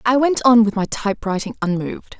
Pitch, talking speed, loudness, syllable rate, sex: 220 Hz, 190 wpm, -18 LUFS, 5.9 syllables/s, female